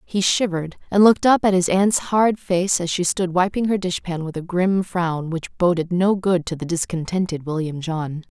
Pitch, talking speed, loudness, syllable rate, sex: 180 Hz, 215 wpm, -20 LUFS, 4.8 syllables/s, female